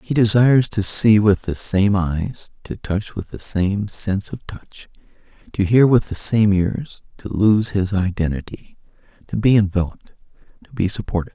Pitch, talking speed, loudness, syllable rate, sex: 100 Hz, 170 wpm, -18 LUFS, 4.6 syllables/s, male